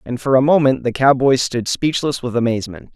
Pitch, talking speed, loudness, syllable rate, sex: 130 Hz, 205 wpm, -16 LUFS, 5.6 syllables/s, male